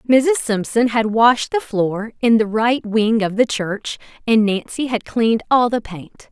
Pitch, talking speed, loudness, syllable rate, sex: 225 Hz, 190 wpm, -18 LUFS, 4.1 syllables/s, female